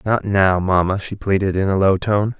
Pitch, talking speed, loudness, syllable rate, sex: 95 Hz, 225 wpm, -18 LUFS, 4.9 syllables/s, male